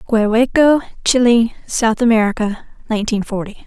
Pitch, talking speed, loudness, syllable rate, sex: 225 Hz, 100 wpm, -16 LUFS, 5.3 syllables/s, female